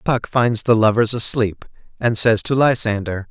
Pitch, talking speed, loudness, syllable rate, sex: 115 Hz, 165 wpm, -17 LUFS, 4.5 syllables/s, male